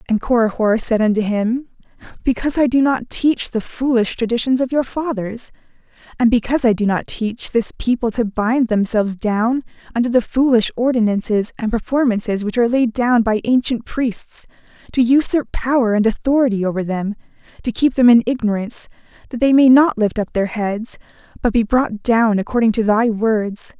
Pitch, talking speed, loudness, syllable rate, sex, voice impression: 230 Hz, 175 wpm, -17 LUFS, 5.2 syllables/s, female, feminine, adult-like, tensed, powerful, bright, soft, slightly raspy, intellectual, calm, friendly, slightly reassuring, elegant, lively, kind